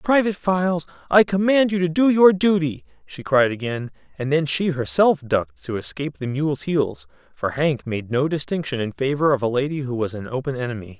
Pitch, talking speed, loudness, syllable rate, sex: 145 Hz, 195 wpm, -21 LUFS, 5.5 syllables/s, male